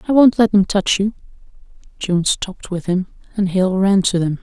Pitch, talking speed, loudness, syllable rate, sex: 195 Hz, 205 wpm, -17 LUFS, 5.1 syllables/s, female